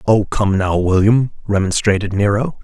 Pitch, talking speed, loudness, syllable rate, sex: 100 Hz, 135 wpm, -16 LUFS, 4.6 syllables/s, male